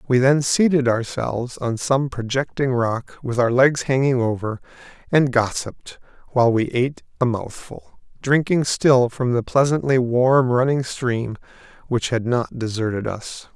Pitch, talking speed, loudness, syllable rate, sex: 125 Hz, 140 wpm, -20 LUFS, 4.4 syllables/s, male